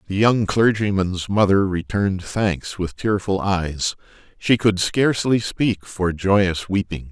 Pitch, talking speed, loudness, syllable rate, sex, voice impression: 100 Hz, 135 wpm, -20 LUFS, 3.8 syllables/s, male, masculine, middle-aged, thick, tensed, slightly hard, clear, cool, sincere, slightly mature, slightly friendly, reassuring, wild, lively, slightly strict